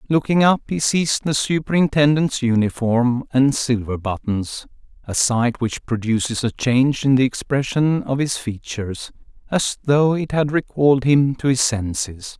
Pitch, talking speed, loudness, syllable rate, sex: 130 Hz, 150 wpm, -19 LUFS, 4.5 syllables/s, male